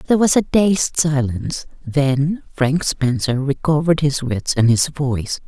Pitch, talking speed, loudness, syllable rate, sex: 145 Hz, 155 wpm, -18 LUFS, 4.3 syllables/s, female